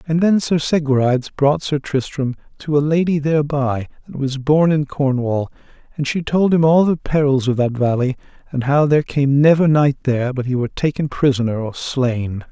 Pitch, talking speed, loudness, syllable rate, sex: 140 Hz, 190 wpm, -17 LUFS, 5.1 syllables/s, male